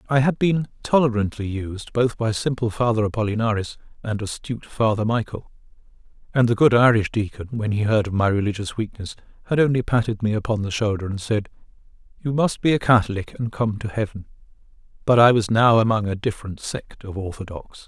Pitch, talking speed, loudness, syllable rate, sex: 110 Hz, 180 wpm, -21 LUFS, 5.7 syllables/s, male